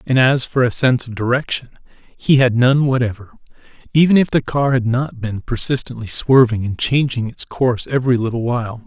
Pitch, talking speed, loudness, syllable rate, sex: 125 Hz, 175 wpm, -17 LUFS, 5.6 syllables/s, male